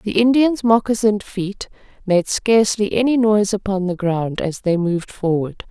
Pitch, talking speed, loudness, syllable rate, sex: 205 Hz, 160 wpm, -18 LUFS, 4.9 syllables/s, female